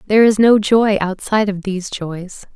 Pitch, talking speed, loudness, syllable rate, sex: 205 Hz, 190 wpm, -15 LUFS, 5.2 syllables/s, female